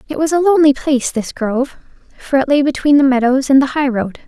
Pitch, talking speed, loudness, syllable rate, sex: 275 Hz, 240 wpm, -14 LUFS, 6.3 syllables/s, female